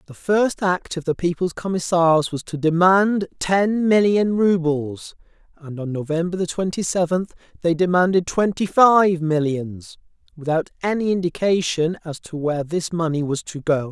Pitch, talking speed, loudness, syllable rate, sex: 170 Hz, 145 wpm, -20 LUFS, 4.5 syllables/s, male